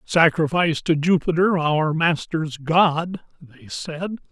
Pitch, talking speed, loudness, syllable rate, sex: 160 Hz, 110 wpm, -20 LUFS, 3.7 syllables/s, male